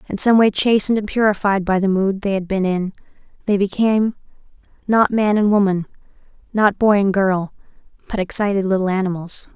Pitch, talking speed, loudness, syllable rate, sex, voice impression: 200 Hz, 170 wpm, -18 LUFS, 5.6 syllables/s, female, feminine, adult-like, slightly relaxed, weak, soft, intellectual, calm, friendly, reassuring, elegant, slightly lively, kind, modest